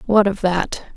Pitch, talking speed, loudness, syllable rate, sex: 195 Hz, 190 wpm, -19 LUFS, 4.1 syllables/s, female